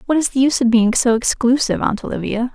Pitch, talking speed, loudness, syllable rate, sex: 245 Hz, 235 wpm, -16 LUFS, 6.7 syllables/s, female